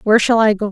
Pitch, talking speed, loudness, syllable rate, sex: 215 Hz, 335 wpm, -14 LUFS, 7.6 syllables/s, female